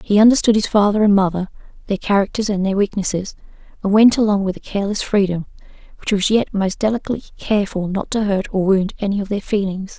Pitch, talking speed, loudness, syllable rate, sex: 200 Hz, 190 wpm, -18 LUFS, 6.4 syllables/s, female